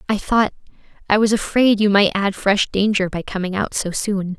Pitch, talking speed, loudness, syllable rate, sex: 200 Hz, 190 wpm, -18 LUFS, 5.0 syllables/s, female